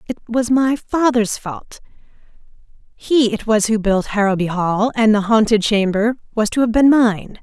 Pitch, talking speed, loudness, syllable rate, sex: 220 Hz, 170 wpm, -16 LUFS, 4.5 syllables/s, female